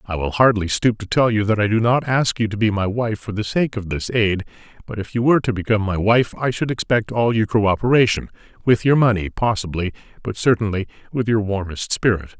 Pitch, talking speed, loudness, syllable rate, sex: 110 Hz, 220 wpm, -19 LUFS, 5.7 syllables/s, male